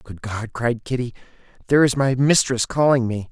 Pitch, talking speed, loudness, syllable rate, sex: 125 Hz, 180 wpm, -20 LUFS, 5.3 syllables/s, male